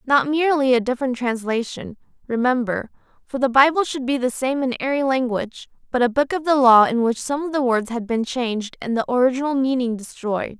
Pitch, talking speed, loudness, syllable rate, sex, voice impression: 255 Hz, 205 wpm, -20 LUFS, 5.8 syllables/s, female, feminine, slightly adult-like, slightly cute, refreshing, friendly, slightly kind